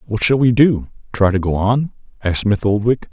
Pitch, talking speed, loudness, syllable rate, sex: 110 Hz, 190 wpm, -16 LUFS, 5.4 syllables/s, male